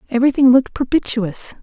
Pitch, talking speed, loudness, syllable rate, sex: 250 Hz, 110 wpm, -16 LUFS, 6.5 syllables/s, female